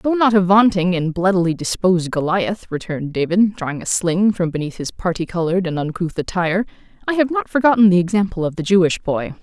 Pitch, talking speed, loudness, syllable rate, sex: 185 Hz, 195 wpm, -18 LUFS, 5.9 syllables/s, female